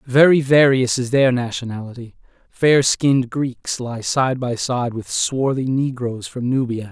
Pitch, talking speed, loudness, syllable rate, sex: 125 Hz, 150 wpm, -18 LUFS, 4.2 syllables/s, male